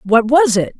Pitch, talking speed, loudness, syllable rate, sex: 245 Hz, 225 wpm, -13 LUFS, 4.4 syllables/s, female